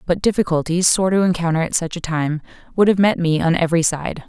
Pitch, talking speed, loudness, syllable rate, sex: 170 Hz, 225 wpm, -18 LUFS, 6.1 syllables/s, female